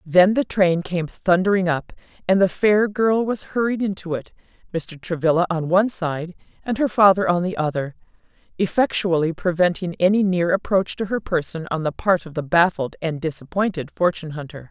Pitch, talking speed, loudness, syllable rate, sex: 180 Hz, 175 wpm, -21 LUFS, 5.2 syllables/s, female